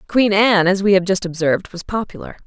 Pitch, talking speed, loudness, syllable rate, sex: 195 Hz, 220 wpm, -17 LUFS, 6.3 syllables/s, female